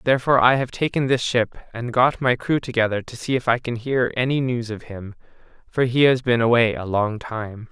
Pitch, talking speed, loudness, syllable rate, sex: 120 Hz, 225 wpm, -21 LUFS, 5.3 syllables/s, male